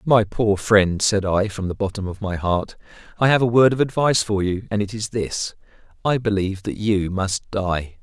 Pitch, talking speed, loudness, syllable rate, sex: 100 Hz, 215 wpm, -21 LUFS, 4.9 syllables/s, male